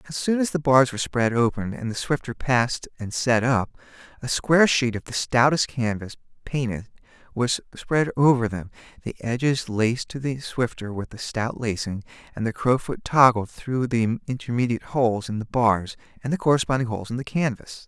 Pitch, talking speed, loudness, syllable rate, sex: 125 Hz, 180 wpm, -23 LUFS, 5.2 syllables/s, male